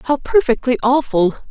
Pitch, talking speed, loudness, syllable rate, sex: 250 Hz, 120 wpm, -16 LUFS, 5.4 syllables/s, female